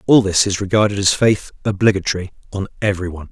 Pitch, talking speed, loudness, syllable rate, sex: 100 Hz, 165 wpm, -17 LUFS, 6.6 syllables/s, male